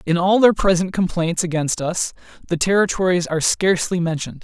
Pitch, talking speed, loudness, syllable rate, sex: 175 Hz, 160 wpm, -19 LUFS, 5.8 syllables/s, male